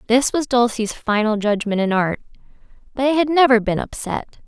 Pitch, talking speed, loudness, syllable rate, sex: 235 Hz, 175 wpm, -19 LUFS, 5.4 syllables/s, female